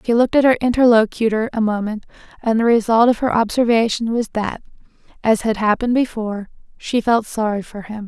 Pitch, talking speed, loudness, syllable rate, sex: 225 Hz, 165 wpm, -17 LUFS, 5.9 syllables/s, female